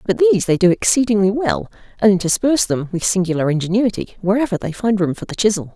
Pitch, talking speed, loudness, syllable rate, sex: 205 Hz, 200 wpm, -17 LUFS, 6.7 syllables/s, female